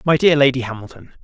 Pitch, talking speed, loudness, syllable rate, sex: 130 Hz, 195 wpm, -15 LUFS, 6.6 syllables/s, male